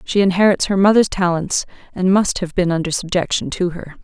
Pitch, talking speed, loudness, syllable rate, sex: 185 Hz, 195 wpm, -17 LUFS, 5.5 syllables/s, female